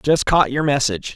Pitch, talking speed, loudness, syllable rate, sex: 140 Hz, 210 wpm, -18 LUFS, 5.4 syllables/s, male